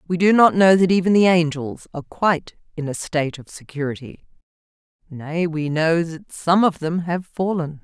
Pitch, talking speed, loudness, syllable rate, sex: 165 Hz, 185 wpm, -19 LUFS, 5.0 syllables/s, female